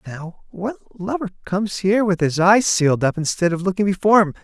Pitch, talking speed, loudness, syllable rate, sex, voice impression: 180 Hz, 205 wpm, -19 LUFS, 5.8 syllables/s, male, masculine, adult-like, slightly refreshing, sincere, calm, kind